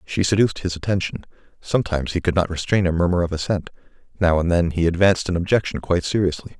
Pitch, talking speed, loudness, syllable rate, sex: 90 Hz, 200 wpm, -21 LUFS, 7.0 syllables/s, male